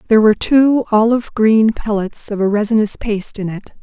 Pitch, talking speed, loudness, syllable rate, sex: 215 Hz, 190 wpm, -15 LUFS, 5.9 syllables/s, female